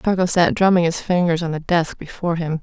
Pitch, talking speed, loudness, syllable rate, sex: 170 Hz, 230 wpm, -19 LUFS, 5.8 syllables/s, female